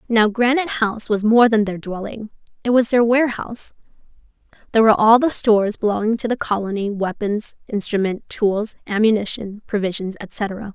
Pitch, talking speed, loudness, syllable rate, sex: 215 Hz, 150 wpm, -19 LUFS, 5.5 syllables/s, female